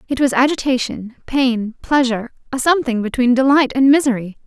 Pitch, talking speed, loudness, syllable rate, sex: 255 Hz, 150 wpm, -16 LUFS, 5.7 syllables/s, female